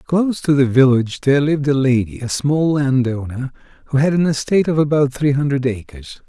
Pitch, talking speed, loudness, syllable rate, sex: 135 Hz, 190 wpm, -17 LUFS, 5.7 syllables/s, male